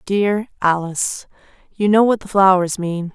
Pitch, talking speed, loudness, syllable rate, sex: 190 Hz, 155 wpm, -17 LUFS, 4.4 syllables/s, female